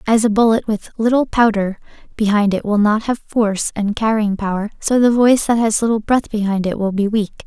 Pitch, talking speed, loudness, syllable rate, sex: 215 Hz, 215 wpm, -17 LUFS, 5.6 syllables/s, female